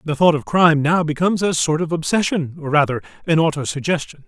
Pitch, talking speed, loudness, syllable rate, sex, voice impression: 160 Hz, 195 wpm, -18 LUFS, 6.3 syllables/s, male, masculine, slightly middle-aged, muffled, reassuring, slightly unique